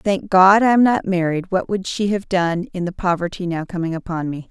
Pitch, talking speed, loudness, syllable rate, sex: 185 Hz, 240 wpm, -18 LUFS, 5.3 syllables/s, female